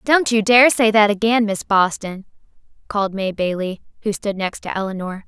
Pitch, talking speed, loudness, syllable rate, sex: 205 Hz, 180 wpm, -18 LUFS, 5.1 syllables/s, female